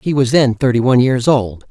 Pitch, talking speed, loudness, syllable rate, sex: 125 Hz, 245 wpm, -14 LUFS, 5.5 syllables/s, male